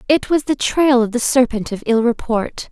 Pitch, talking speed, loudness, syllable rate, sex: 245 Hz, 220 wpm, -17 LUFS, 4.8 syllables/s, female